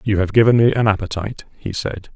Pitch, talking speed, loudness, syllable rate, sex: 105 Hz, 220 wpm, -17 LUFS, 6.3 syllables/s, male